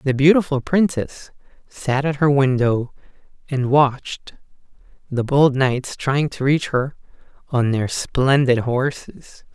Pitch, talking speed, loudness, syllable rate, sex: 135 Hz, 125 wpm, -19 LUFS, 3.7 syllables/s, male